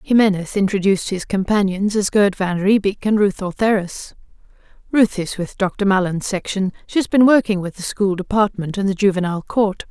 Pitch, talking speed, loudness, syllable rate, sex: 195 Hz, 170 wpm, -18 LUFS, 5.2 syllables/s, female